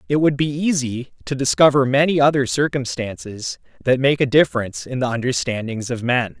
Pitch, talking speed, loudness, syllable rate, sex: 130 Hz, 170 wpm, -19 LUFS, 5.5 syllables/s, male